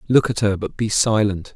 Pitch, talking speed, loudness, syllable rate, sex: 105 Hz, 230 wpm, -19 LUFS, 5.1 syllables/s, male